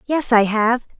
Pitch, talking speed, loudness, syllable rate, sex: 235 Hz, 180 wpm, -17 LUFS, 4.0 syllables/s, female